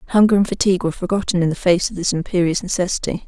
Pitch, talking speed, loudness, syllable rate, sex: 180 Hz, 220 wpm, -18 LUFS, 7.7 syllables/s, female